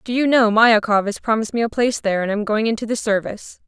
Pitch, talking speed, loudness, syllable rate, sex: 220 Hz, 260 wpm, -18 LUFS, 6.8 syllables/s, female